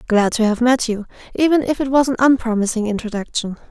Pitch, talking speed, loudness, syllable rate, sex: 240 Hz, 195 wpm, -18 LUFS, 6.1 syllables/s, female